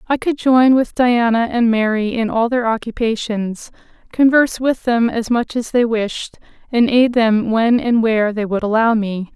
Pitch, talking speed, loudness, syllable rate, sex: 230 Hz, 185 wpm, -16 LUFS, 4.5 syllables/s, female